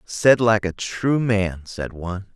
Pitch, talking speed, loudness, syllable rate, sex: 100 Hz, 180 wpm, -21 LUFS, 3.7 syllables/s, male